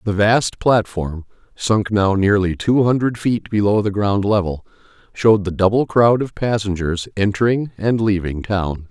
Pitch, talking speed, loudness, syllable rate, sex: 105 Hz, 155 wpm, -18 LUFS, 4.4 syllables/s, male